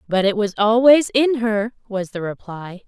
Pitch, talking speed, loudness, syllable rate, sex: 215 Hz, 190 wpm, -18 LUFS, 4.5 syllables/s, female